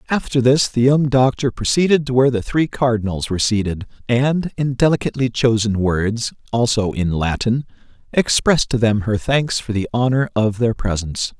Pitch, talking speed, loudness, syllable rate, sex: 120 Hz, 170 wpm, -18 LUFS, 5.2 syllables/s, male